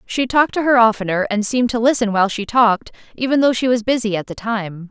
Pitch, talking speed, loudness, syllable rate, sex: 230 Hz, 245 wpm, -17 LUFS, 6.5 syllables/s, female